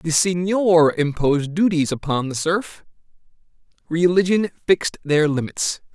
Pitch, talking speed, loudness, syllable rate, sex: 165 Hz, 110 wpm, -19 LUFS, 4.4 syllables/s, male